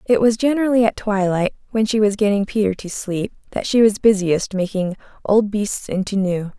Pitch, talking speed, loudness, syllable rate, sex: 205 Hz, 190 wpm, -19 LUFS, 5.2 syllables/s, female